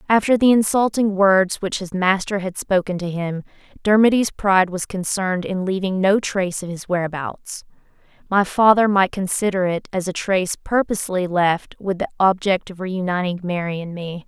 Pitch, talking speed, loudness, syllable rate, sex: 190 Hz, 170 wpm, -20 LUFS, 5.1 syllables/s, female